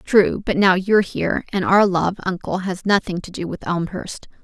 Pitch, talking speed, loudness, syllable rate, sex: 190 Hz, 205 wpm, -20 LUFS, 4.9 syllables/s, female